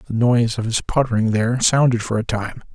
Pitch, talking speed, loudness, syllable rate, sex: 115 Hz, 220 wpm, -19 LUFS, 6.1 syllables/s, male